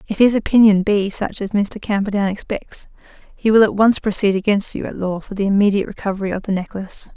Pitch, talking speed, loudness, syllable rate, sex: 200 Hz, 210 wpm, -18 LUFS, 6.0 syllables/s, female